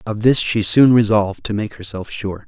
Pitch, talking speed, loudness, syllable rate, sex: 110 Hz, 220 wpm, -16 LUFS, 5.1 syllables/s, male